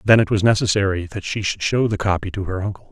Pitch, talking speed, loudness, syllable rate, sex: 100 Hz, 270 wpm, -20 LUFS, 6.4 syllables/s, male